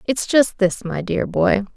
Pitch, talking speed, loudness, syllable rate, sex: 210 Hz, 205 wpm, -19 LUFS, 3.8 syllables/s, female